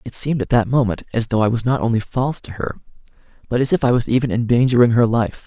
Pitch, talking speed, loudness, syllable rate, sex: 120 Hz, 255 wpm, -18 LUFS, 6.7 syllables/s, male